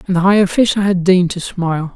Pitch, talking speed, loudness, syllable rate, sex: 185 Hz, 245 wpm, -14 LUFS, 6.6 syllables/s, male